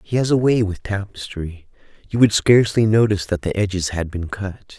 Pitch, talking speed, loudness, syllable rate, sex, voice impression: 100 Hz, 200 wpm, -19 LUFS, 5.4 syllables/s, male, masculine, adult-like, slightly middle-aged, thick, slightly relaxed, slightly weak, slightly dark, slightly hard, slightly clear, slightly fluent, slightly raspy, cool, intellectual, slightly sincere, very calm, mature, slightly friendly, reassuring, slightly unique, wild, slightly sweet, kind, very modest